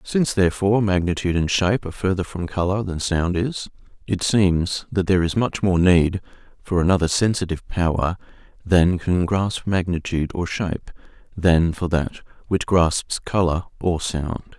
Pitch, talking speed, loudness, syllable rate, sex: 90 Hz, 155 wpm, -21 LUFS, 5.0 syllables/s, male